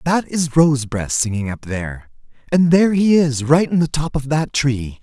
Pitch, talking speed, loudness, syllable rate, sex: 140 Hz, 205 wpm, -17 LUFS, 4.9 syllables/s, male